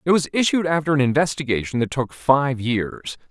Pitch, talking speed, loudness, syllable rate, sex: 140 Hz, 180 wpm, -20 LUFS, 5.2 syllables/s, male